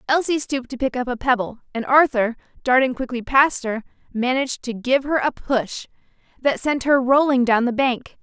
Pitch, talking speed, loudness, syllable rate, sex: 255 Hz, 190 wpm, -20 LUFS, 5.1 syllables/s, female